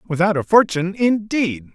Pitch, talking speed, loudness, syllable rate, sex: 185 Hz, 140 wpm, -18 LUFS, 4.8 syllables/s, male